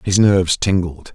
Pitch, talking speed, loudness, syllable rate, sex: 95 Hz, 155 wpm, -16 LUFS, 4.8 syllables/s, male